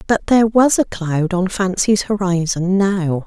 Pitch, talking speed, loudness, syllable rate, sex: 190 Hz, 165 wpm, -16 LUFS, 4.2 syllables/s, female